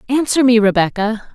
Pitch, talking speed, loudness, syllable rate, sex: 230 Hz, 135 wpm, -15 LUFS, 5.4 syllables/s, female